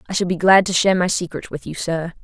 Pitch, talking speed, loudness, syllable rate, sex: 175 Hz, 295 wpm, -18 LUFS, 6.6 syllables/s, female